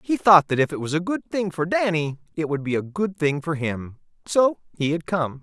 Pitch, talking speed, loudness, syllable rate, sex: 165 Hz, 255 wpm, -22 LUFS, 5.1 syllables/s, male